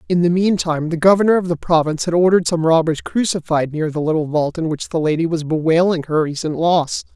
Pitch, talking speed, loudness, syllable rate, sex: 165 Hz, 220 wpm, -17 LUFS, 6.1 syllables/s, male